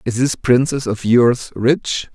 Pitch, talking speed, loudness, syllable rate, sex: 120 Hz, 170 wpm, -16 LUFS, 3.5 syllables/s, male